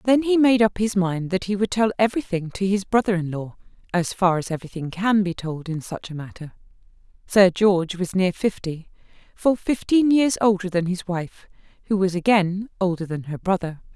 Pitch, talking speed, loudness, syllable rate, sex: 190 Hz, 200 wpm, -22 LUFS, 5.2 syllables/s, female